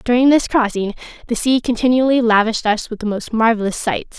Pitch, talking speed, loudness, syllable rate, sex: 230 Hz, 185 wpm, -17 LUFS, 5.9 syllables/s, female